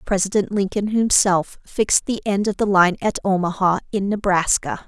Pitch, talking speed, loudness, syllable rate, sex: 195 Hz, 160 wpm, -19 LUFS, 5.0 syllables/s, female